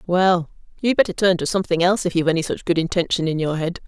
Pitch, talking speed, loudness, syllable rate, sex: 175 Hz, 250 wpm, -20 LUFS, 7.1 syllables/s, female